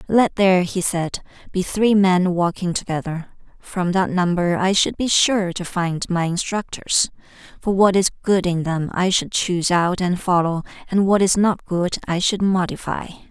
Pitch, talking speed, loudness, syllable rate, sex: 185 Hz, 180 wpm, -19 LUFS, 4.4 syllables/s, female